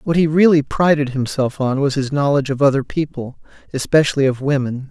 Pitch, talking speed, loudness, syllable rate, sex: 140 Hz, 185 wpm, -17 LUFS, 5.7 syllables/s, male